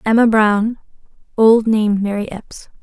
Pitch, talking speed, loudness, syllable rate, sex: 215 Hz, 125 wpm, -15 LUFS, 3.0 syllables/s, female